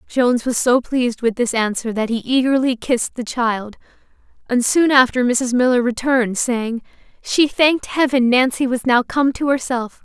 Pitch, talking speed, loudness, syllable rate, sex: 250 Hz, 175 wpm, -17 LUFS, 4.9 syllables/s, female